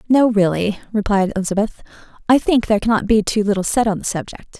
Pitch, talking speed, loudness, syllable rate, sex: 210 Hz, 195 wpm, -18 LUFS, 6.3 syllables/s, female